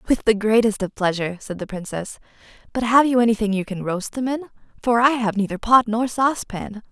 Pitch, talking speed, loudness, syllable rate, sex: 220 Hz, 210 wpm, -21 LUFS, 5.9 syllables/s, female